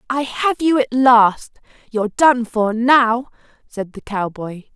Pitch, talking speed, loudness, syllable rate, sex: 240 Hz, 150 wpm, -16 LUFS, 3.8 syllables/s, female